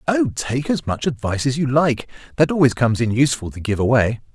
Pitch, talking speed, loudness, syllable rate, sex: 130 Hz, 220 wpm, -19 LUFS, 6.1 syllables/s, male